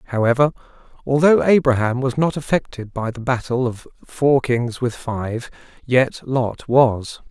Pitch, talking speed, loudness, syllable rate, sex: 125 Hz, 140 wpm, -19 LUFS, 4.2 syllables/s, male